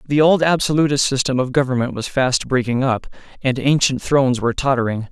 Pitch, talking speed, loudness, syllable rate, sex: 130 Hz, 175 wpm, -18 LUFS, 5.8 syllables/s, male